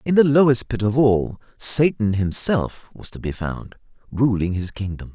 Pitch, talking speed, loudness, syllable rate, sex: 115 Hz, 175 wpm, -20 LUFS, 4.5 syllables/s, male